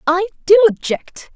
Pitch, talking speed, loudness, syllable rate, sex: 325 Hz, 135 wpm, -15 LUFS, 4.0 syllables/s, female